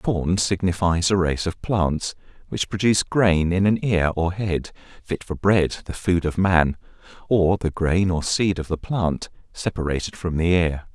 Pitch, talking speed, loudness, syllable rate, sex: 90 Hz, 180 wpm, -22 LUFS, 4.2 syllables/s, male